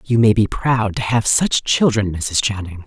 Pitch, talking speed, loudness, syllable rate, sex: 110 Hz, 210 wpm, -17 LUFS, 4.3 syllables/s, female